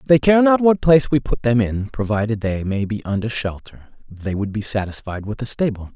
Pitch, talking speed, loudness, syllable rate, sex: 120 Hz, 220 wpm, -19 LUFS, 5.4 syllables/s, male